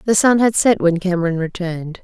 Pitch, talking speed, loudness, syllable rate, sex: 185 Hz, 205 wpm, -17 LUFS, 5.8 syllables/s, female